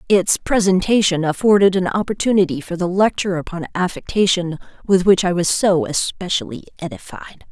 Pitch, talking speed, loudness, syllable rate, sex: 185 Hz, 135 wpm, -17 LUFS, 5.5 syllables/s, female